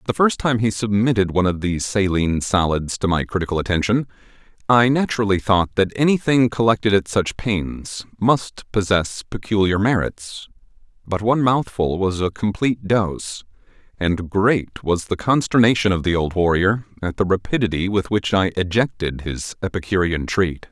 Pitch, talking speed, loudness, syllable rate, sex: 100 Hz, 155 wpm, -20 LUFS, 5.0 syllables/s, male